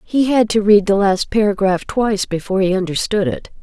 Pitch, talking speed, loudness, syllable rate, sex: 200 Hz, 200 wpm, -16 LUFS, 5.5 syllables/s, female